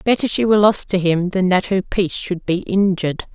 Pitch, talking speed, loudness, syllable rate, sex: 190 Hz, 235 wpm, -18 LUFS, 5.6 syllables/s, female